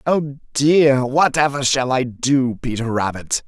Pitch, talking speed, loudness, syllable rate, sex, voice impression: 135 Hz, 140 wpm, -18 LUFS, 3.6 syllables/s, male, masculine, adult-like, tensed, slightly powerful, slightly soft, cool, slightly intellectual, calm, friendly, slightly wild, lively, slightly kind